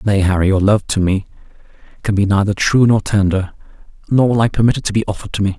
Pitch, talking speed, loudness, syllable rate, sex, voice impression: 105 Hz, 225 wpm, -15 LUFS, 6.8 syllables/s, male, masculine, adult-like, tensed, powerful, slightly hard, muffled, cool, intellectual, calm, mature, slightly friendly, reassuring, wild, lively